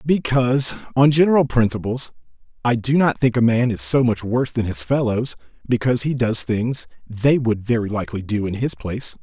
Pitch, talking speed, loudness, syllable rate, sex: 120 Hz, 190 wpm, -19 LUFS, 5.4 syllables/s, male